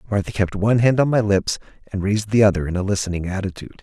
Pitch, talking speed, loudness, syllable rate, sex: 100 Hz, 235 wpm, -20 LUFS, 7.4 syllables/s, male